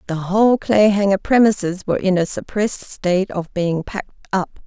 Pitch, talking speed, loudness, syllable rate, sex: 195 Hz, 165 wpm, -18 LUFS, 5.5 syllables/s, female